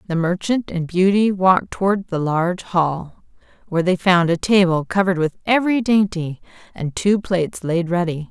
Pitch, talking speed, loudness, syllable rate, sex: 180 Hz, 165 wpm, -19 LUFS, 5.1 syllables/s, female